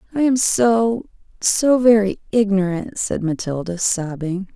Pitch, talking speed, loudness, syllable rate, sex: 205 Hz, 105 wpm, -18 LUFS, 4.0 syllables/s, female